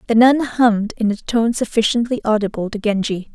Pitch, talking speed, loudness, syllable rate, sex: 225 Hz, 180 wpm, -18 LUFS, 5.5 syllables/s, female